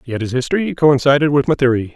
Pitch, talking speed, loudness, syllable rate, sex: 140 Hz, 215 wpm, -15 LUFS, 6.6 syllables/s, male